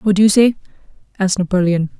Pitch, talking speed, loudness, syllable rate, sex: 195 Hz, 180 wpm, -15 LUFS, 7.0 syllables/s, female